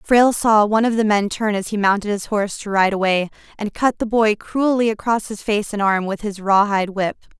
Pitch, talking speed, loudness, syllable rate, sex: 210 Hz, 235 wpm, -19 LUFS, 5.6 syllables/s, female